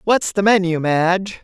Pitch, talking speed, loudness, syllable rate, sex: 185 Hz, 165 wpm, -17 LUFS, 4.6 syllables/s, female